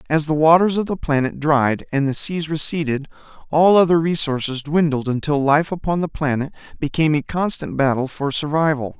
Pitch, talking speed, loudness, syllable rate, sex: 150 Hz, 175 wpm, -19 LUFS, 5.3 syllables/s, male